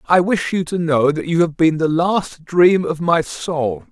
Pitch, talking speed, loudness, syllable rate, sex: 165 Hz, 230 wpm, -17 LUFS, 4.0 syllables/s, male